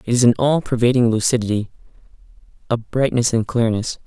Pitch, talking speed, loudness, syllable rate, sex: 120 Hz, 150 wpm, -18 LUFS, 5.9 syllables/s, male